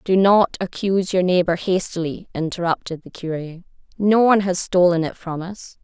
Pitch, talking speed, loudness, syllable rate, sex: 180 Hz, 165 wpm, -20 LUFS, 4.9 syllables/s, female